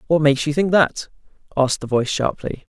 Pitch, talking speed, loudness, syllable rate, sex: 145 Hz, 195 wpm, -19 LUFS, 6.3 syllables/s, male